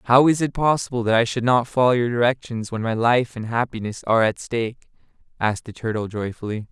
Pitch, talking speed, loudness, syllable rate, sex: 120 Hz, 205 wpm, -21 LUFS, 6.0 syllables/s, male